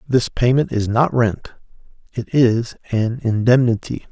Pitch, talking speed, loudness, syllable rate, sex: 120 Hz, 130 wpm, -18 LUFS, 4.0 syllables/s, male